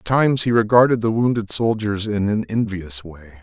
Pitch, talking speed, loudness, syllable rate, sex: 105 Hz, 195 wpm, -19 LUFS, 5.4 syllables/s, male